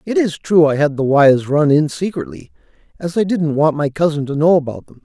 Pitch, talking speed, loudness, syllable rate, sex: 160 Hz, 240 wpm, -15 LUFS, 5.6 syllables/s, male